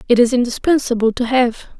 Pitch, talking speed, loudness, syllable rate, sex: 245 Hz, 165 wpm, -16 LUFS, 5.9 syllables/s, female